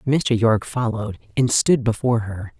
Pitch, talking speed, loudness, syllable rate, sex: 115 Hz, 160 wpm, -20 LUFS, 5.3 syllables/s, female